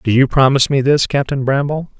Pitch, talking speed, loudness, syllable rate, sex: 135 Hz, 210 wpm, -14 LUFS, 5.8 syllables/s, male